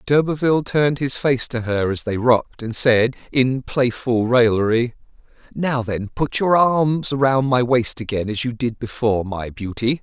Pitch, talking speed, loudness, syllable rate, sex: 125 Hz, 175 wpm, -19 LUFS, 4.5 syllables/s, male